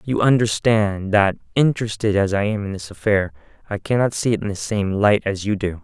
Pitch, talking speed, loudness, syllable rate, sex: 105 Hz, 215 wpm, -20 LUFS, 5.4 syllables/s, male